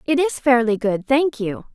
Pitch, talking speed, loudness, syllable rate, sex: 250 Hz, 205 wpm, -19 LUFS, 4.5 syllables/s, female